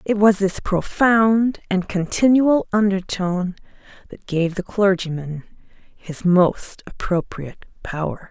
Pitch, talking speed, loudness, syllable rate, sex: 190 Hz, 110 wpm, -19 LUFS, 3.9 syllables/s, female